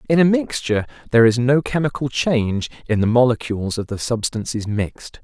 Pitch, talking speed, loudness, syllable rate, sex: 125 Hz, 170 wpm, -19 LUFS, 5.8 syllables/s, male